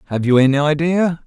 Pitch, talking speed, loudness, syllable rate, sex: 150 Hz, 190 wpm, -16 LUFS, 5.7 syllables/s, male